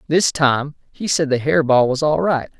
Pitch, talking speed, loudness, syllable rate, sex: 145 Hz, 230 wpm, -17 LUFS, 4.6 syllables/s, male